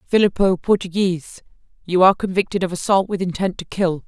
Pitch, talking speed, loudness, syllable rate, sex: 185 Hz, 160 wpm, -19 LUFS, 6.1 syllables/s, female